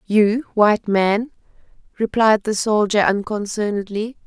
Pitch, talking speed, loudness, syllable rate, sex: 210 Hz, 100 wpm, -19 LUFS, 4.2 syllables/s, female